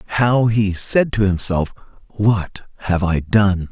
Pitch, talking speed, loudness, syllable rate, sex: 100 Hz, 145 wpm, -18 LUFS, 3.6 syllables/s, male